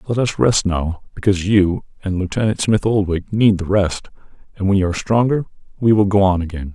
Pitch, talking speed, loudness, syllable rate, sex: 100 Hz, 205 wpm, -18 LUFS, 5.6 syllables/s, male